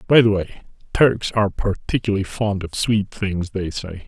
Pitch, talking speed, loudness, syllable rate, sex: 100 Hz, 175 wpm, -21 LUFS, 5.0 syllables/s, male